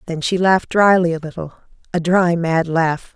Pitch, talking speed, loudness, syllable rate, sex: 170 Hz, 170 wpm, -17 LUFS, 4.8 syllables/s, female